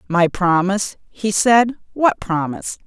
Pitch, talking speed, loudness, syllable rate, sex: 195 Hz, 125 wpm, -18 LUFS, 4.3 syllables/s, female